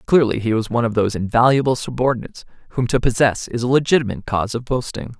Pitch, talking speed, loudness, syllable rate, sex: 120 Hz, 195 wpm, -19 LUFS, 7.2 syllables/s, male